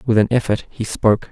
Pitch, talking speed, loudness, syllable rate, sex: 110 Hz, 230 wpm, -18 LUFS, 6.4 syllables/s, male